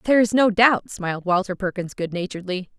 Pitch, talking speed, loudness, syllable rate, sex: 195 Hz, 195 wpm, -21 LUFS, 6.2 syllables/s, female